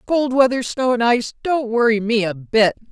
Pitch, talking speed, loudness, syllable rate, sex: 240 Hz, 205 wpm, -18 LUFS, 5.2 syllables/s, female